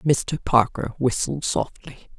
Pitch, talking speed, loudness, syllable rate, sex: 135 Hz, 110 wpm, -23 LUFS, 3.4 syllables/s, female